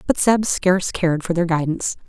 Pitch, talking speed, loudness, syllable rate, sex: 180 Hz, 200 wpm, -19 LUFS, 5.9 syllables/s, female